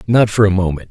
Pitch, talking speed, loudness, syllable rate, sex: 100 Hz, 265 wpm, -14 LUFS, 6.5 syllables/s, male